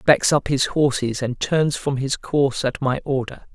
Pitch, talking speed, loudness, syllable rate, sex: 135 Hz, 205 wpm, -21 LUFS, 4.3 syllables/s, male